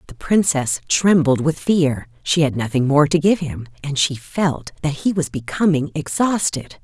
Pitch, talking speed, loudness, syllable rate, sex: 150 Hz, 175 wpm, -19 LUFS, 4.4 syllables/s, female